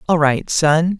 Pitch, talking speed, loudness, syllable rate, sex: 160 Hz, 180 wpm, -16 LUFS, 3.6 syllables/s, male